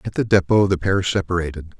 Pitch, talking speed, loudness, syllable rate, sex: 90 Hz, 200 wpm, -19 LUFS, 6.2 syllables/s, male